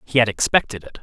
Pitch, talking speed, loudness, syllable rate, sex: 115 Hz, 235 wpm, -18 LUFS, 6.7 syllables/s, male